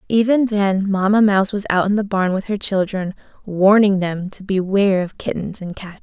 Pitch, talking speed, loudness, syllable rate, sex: 195 Hz, 200 wpm, -18 LUFS, 5.1 syllables/s, female